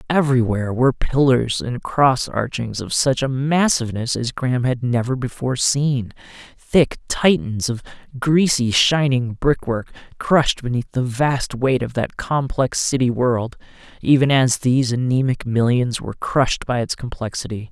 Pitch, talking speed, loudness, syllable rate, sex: 125 Hz, 140 wpm, -19 LUFS, 4.6 syllables/s, male